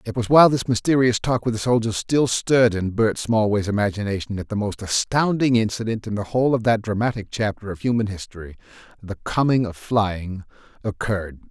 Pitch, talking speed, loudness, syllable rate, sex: 110 Hz, 180 wpm, -21 LUFS, 5.7 syllables/s, male